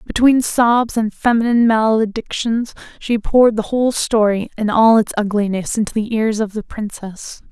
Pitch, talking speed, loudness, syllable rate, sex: 220 Hz, 160 wpm, -16 LUFS, 4.8 syllables/s, female